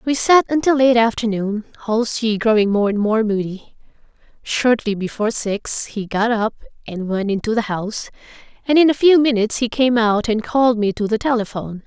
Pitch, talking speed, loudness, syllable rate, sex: 225 Hz, 180 wpm, -18 LUFS, 5.3 syllables/s, female